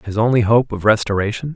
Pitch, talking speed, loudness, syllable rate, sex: 110 Hz, 195 wpm, -17 LUFS, 6.2 syllables/s, male